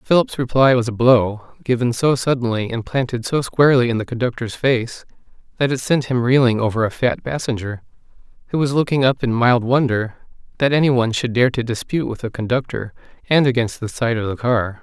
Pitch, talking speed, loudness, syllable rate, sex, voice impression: 120 Hz, 200 wpm, -18 LUFS, 5.7 syllables/s, male, masculine, adult-like, slightly tensed, bright, slightly muffled, slightly raspy, intellectual, sincere, calm, wild, lively, slightly modest